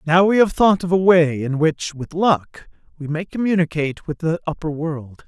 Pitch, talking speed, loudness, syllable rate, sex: 165 Hz, 205 wpm, -19 LUFS, 4.9 syllables/s, male